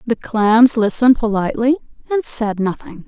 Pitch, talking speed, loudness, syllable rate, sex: 230 Hz, 135 wpm, -16 LUFS, 5.1 syllables/s, female